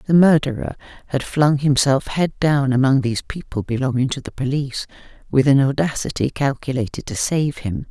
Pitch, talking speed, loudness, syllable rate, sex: 135 Hz, 160 wpm, -19 LUFS, 5.3 syllables/s, female